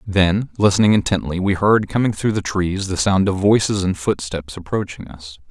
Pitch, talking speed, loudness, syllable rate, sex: 95 Hz, 185 wpm, -18 LUFS, 4.9 syllables/s, male